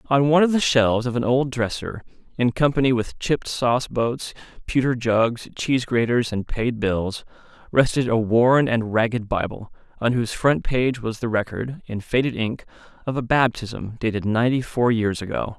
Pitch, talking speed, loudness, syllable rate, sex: 120 Hz, 175 wpm, -22 LUFS, 5.0 syllables/s, male